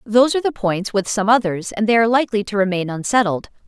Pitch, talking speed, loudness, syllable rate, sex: 215 Hz, 195 wpm, -18 LUFS, 6.7 syllables/s, female